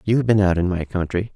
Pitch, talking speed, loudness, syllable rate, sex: 95 Hz, 265 wpm, -20 LUFS, 6.4 syllables/s, male